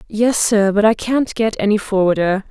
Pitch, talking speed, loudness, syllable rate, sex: 210 Hz, 190 wpm, -16 LUFS, 4.8 syllables/s, female